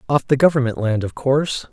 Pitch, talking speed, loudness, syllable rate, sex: 135 Hz, 210 wpm, -18 LUFS, 5.9 syllables/s, male